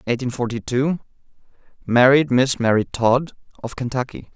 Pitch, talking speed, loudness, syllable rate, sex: 125 Hz, 110 wpm, -19 LUFS, 6.4 syllables/s, male